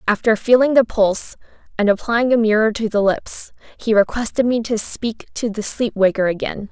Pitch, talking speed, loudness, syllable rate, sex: 220 Hz, 190 wpm, -18 LUFS, 5.1 syllables/s, female